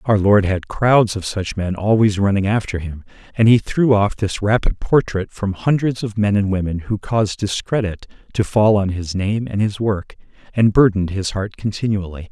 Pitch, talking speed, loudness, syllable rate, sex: 105 Hz, 195 wpm, -18 LUFS, 4.9 syllables/s, male